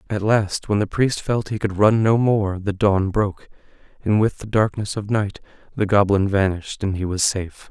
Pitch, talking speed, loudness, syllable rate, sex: 100 Hz, 210 wpm, -20 LUFS, 5.0 syllables/s, male